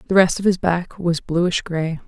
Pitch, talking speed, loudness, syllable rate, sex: 175 Hz, 230 wpm, -20 LUFS, 4.4 syllables/s, female